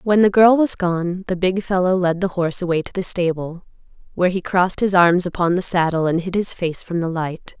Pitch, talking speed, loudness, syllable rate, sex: 180 Hz, 235 wpm, -18 LUFS, 5.5 syllables/s, female